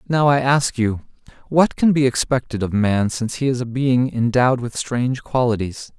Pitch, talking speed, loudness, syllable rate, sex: 125 Hz, 190 wpm, -19 LUFS, 5.1 syllables/s, male